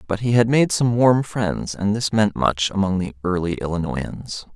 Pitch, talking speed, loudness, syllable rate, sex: 100 Hz, 200 wpm, -20 LUFS, 4.7 syllables/s, male